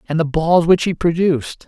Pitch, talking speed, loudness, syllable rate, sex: 165 Hz, 215 wpm, -16 LUFS, 5.3 syllables/s, male